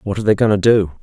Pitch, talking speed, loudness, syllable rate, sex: 105 Hz, 350 wpm, -15 LUFS, 7.7 syllables/s, male